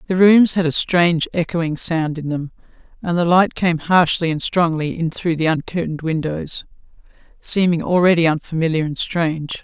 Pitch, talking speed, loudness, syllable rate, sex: 165 Hz, 150 wpm, -18 LUFS, 5.0 syllables/s, female